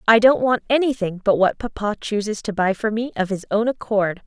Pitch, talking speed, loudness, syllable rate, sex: 215 Hz, 225 wpm, -20 LUFS, 5.4 syllables/s, female